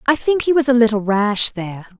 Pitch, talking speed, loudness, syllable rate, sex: 235 Hz, 240 wpm, -16 LUFS, 5.6 syllables/s, female